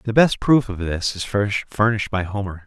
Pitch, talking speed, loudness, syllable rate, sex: 105 Hz, 205 wpm, -20 LUFS, 5.2 syllables/s, male